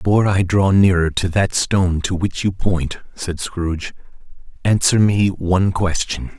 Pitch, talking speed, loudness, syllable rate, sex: 95 Hz, 160 wpm, -18 LUFS, 4.5 syllables/s, male